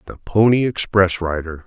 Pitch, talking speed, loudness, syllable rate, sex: 95 Hz, 145 wpm, -18 LUFS, 4.9 syllables/s, male